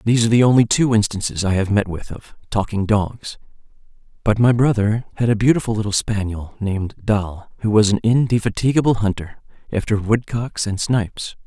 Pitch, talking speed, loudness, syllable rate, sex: 110 Hz, 165 wpm, -19 LUFS, 5.5 syllables/s, male